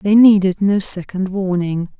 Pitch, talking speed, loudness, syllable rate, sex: 190 Hz, 150 wpm, -16 LUFS, 4.3 syllables/s, female